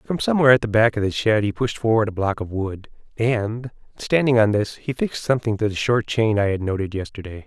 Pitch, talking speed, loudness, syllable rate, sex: 110 Hz, 240 wpm, -21 LUFS, 6.0 syllables/s, male